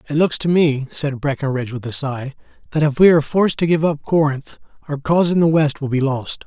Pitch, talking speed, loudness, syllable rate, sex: 145 Hz, 240 wpm, -18 LUFS, 6.0 syllables/s, male